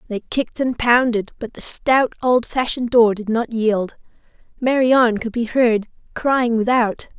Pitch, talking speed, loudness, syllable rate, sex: 235 Hz, 150 wpm, -18 LUFS, 4.5 syllables/s, female